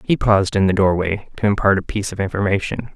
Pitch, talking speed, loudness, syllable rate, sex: 100 Hz, 225 wpm, -18 LUFS, 6.8 syllables/s, male